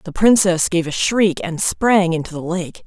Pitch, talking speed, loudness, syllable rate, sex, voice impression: 180 Hz, 210 wpm, -17 LUFS, 4.4 syllables/s, female, feminine, adult-like, tensed, powerful, clear, slightly raspy, intellectual, calm, slightly friendly, elegant, lively, slightly intense, slightly sharp